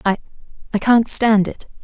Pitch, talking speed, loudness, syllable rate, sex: 215 Hz, 130 wpm, -17 LUFS, 4.8 syllables/s, female